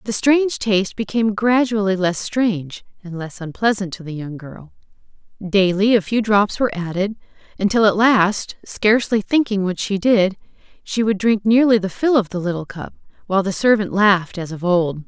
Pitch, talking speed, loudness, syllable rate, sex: 200 Hz, 180 wpm, -18 LUFS, 5.2 syllables/s, female